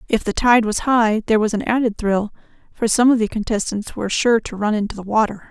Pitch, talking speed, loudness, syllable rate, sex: 220 Hz, 240 wpm, -18 LUFS, 5.9 syllables/s, female